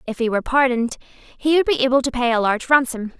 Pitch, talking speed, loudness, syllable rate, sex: 250 Hz, 245 wpm, -19 LUFS, 6.7 syllables/s, female